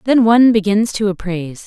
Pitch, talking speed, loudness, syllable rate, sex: 210 Hz, 180 wpm, -14 LUFS, 5.8 syllables/s, female